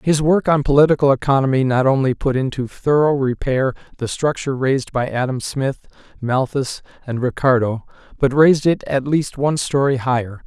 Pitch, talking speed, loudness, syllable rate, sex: 135 Hz, 160 wpm, -18 LUFS, 5.4 syllables/s, male